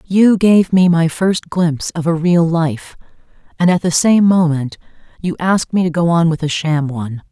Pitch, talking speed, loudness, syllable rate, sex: 170 Hz, 205 wpm, -14 LUFS, 4.8 syllables/s, female